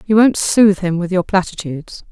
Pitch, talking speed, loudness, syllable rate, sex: 190 Hz, 200 wpm, -15 LUFS, 5.6 syllables/s, female